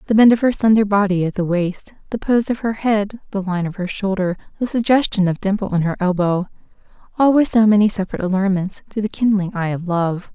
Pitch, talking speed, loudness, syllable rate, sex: 200 Hz, 215 wpm, -18 LUFS, 6.1 syllables/s, female